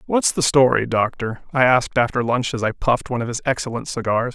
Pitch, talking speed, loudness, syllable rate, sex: 125 Hz, 220 wpm, -20 LUFS, 6.1 syllables/s, male